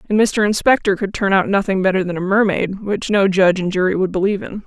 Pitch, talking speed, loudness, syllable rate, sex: 195 Hz, 245 wpm, -17 LUFS, 6.3 syllables/s, female